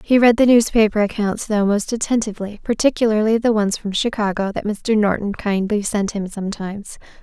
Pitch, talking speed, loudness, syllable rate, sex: 210 Hz, 165 wpm, -19 LUFS, 5.6 syllables/s, female